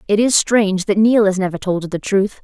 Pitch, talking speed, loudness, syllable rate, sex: 200 Hz, 270 wpm, -16 LUFS, 5.8 syllables/s, female